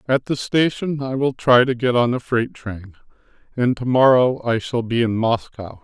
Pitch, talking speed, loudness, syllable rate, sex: 125 Hz, 205 wpm, -19 LUFS, 4.7 syllables/s, male